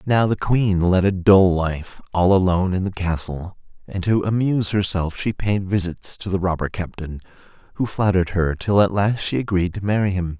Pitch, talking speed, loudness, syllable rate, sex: 95 Hz, 195 wpm, -20 LUFS, 5.0 syllables/s, male